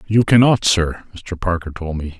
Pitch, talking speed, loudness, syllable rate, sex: 90 Hz, 190 wpm, -17 LUFS, 4.7 syllables/s, male